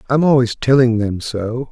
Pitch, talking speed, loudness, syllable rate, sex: 125 Hz, 175 wpm, -16 LUFS, 4.6 syllables/s, male